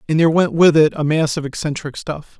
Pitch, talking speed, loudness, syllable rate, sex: 155 Hz, 275 wpm, -16 LUFS, 6.0 syllables/s, male